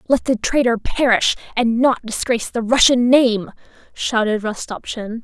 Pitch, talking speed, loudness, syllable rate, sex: 235 Hz, 140 wpm, -17 LUFS, 4.5 syllables/s, female